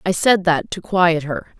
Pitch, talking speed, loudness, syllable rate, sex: 175 Hz, 225 wpm, -18 LUFS, 4.3 syllables/s, female